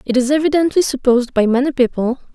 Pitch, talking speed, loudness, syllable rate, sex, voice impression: 265 Hz, 180 wpm, -16 LUFS, 6.6 syllables/s, female, very feminine, young, very thin, slightly relaxed, weak, dark, slightly soft, very clear, fluent, very cute, intellectual, very refreshing, very sincere, very calm, friendly, very reassuring, very unique, elegant, slightly wild, very sweet, slightly lively, very kind, modest